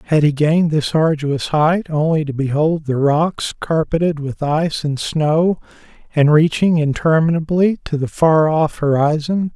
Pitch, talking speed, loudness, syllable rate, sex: 155 Hz, 150 wpm, -16 LUFS, 4.4 syllables/s, male